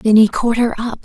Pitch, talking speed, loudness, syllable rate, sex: 225 Hz, 290 wpm, -15 LUFS, 5.3 syllables/s, female